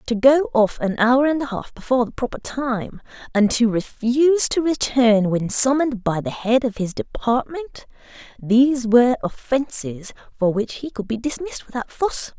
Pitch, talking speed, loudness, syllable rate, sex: 245 Hz, 170 wpm, -20 LUFS, 4.8 syllables/s, female